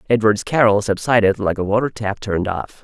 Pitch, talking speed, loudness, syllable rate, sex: 105 Hz, 190 wpm, -18 LUFS, 5.7 syllables/s, male